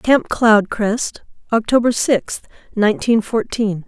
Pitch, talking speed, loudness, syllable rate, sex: 220 Hz, 95 wpm, -17 LUFS, 3.7 syllables/s, female